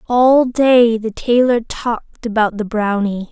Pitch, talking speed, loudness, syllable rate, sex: 230 Hz, 145 wpm, -15 LUFS, 3.9 syllables/s, female